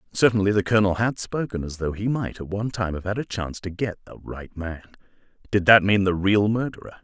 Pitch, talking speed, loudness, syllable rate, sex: 100 Hz, 230 wpm, -23 LUFS, 6.2 syllables/s, male